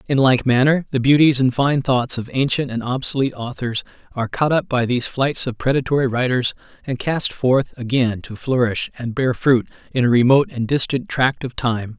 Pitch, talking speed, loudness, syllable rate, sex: 130 Hz, 195 wpm, -19 LUFS, 5.3 syllables/s, male